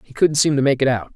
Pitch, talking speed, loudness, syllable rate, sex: 135 Hz, 365 wpm, -17 LUFS, 6.7 syllables/s, male